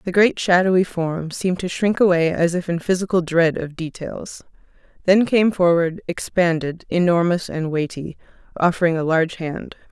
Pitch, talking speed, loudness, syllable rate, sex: 175 Hz, 155 wpm, -19 LUFS, 4.9 syllables/s, female